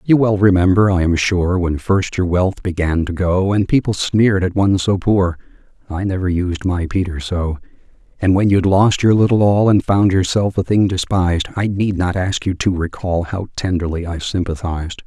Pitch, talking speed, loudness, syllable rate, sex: 95 Hz, 200 wpm, -17 LUFS, 5.0 syllables/s, male